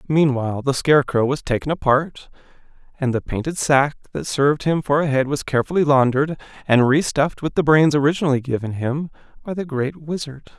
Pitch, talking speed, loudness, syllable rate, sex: 140 Hz, 175 wpm, -19 LUFS, 5.9 syllables/s, male